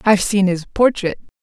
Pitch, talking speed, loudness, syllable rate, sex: 200 Hz, 170 wpm, -17 LUFS, 5.2 syllables/s, female